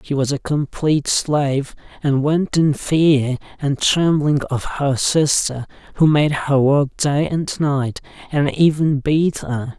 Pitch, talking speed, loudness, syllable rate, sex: 145 Hz, 155 wpm, -18 LUFS, 3.6 syllables/s, male